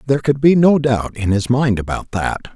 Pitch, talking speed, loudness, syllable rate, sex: 125 Hz, 235 wpm, -16 LUFS, 5.1 syllables/s, male